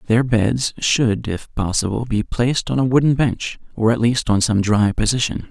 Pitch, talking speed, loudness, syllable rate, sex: 115 Hz, 195 wpm, -18 LUFS, 4.7 syllables/s, male